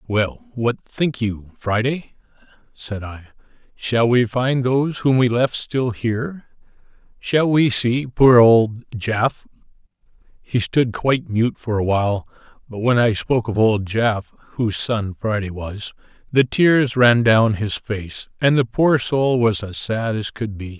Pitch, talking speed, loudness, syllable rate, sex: 115 Hz, 170 wpm, -19 LUFS, 4.0 syllables/s, male